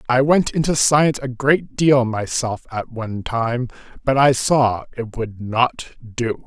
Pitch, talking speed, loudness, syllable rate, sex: 125 Hz, 165 wpm, -19 LUFS, 3.9 syllables/s, male